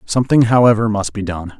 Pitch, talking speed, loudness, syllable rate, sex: 105 Hz, 190 wpm, -15 LUFS, 6.1 syllables/s, male